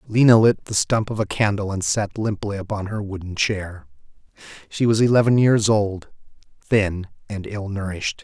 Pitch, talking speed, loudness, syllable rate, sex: 100 Hz, 170 wpm, -20 LUFS, 4.9 syllables/s, male